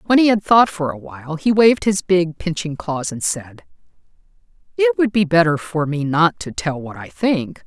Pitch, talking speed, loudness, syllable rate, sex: 175 Hz, 210 wpm, -18 LUFS, 4.8 syllables/s, female